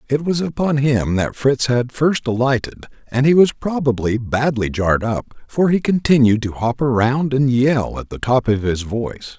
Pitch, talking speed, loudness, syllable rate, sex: 130 Hz, 190 wpm, -18 LUFS, 4.8 syllables/s, male